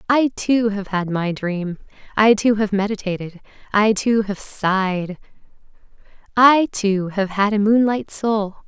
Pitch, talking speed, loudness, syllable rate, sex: 205 Hz, 145 wpm, -19 LUFS, 4.0 syllables/s, female